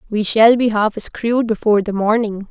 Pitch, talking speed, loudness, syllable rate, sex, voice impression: 215 Hz, 190 wpm, -16 LUFS, 5.2 syllables/s, female, feminine, slightly gender-neutral, slightly young, powerful, soft, halting, calm, friendly, slightly reassuring, unique, lively, kind, slightly modest